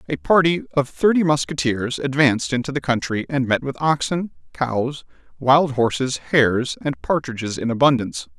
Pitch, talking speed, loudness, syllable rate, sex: 130 Hz, 150 wpm, -20 LUFS, 5.0 syllables/s, male